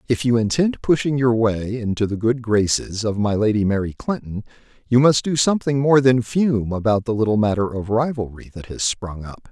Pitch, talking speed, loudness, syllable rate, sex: 115 Hz, 200 wpm, -19 LUFS, 5.2 syllables/s, male